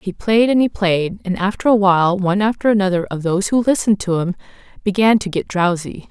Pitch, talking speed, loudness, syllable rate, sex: 195 Hz, 215 wpm, -17 LUFS, 5.9 syllables/s, female